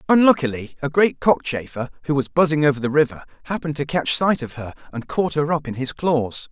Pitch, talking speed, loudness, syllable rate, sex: 145 Hz, 210 wpm, -21 LUFS, 5.9 syllables/s, male